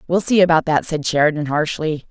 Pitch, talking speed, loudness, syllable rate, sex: 160 Hz, 200 wpm, -17 LUFS, 5.8 syllables/s, female